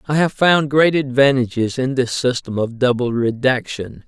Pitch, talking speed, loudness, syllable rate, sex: 130 Hz, 160 wpm, -17 LUFS, 4.6 syllables/s, male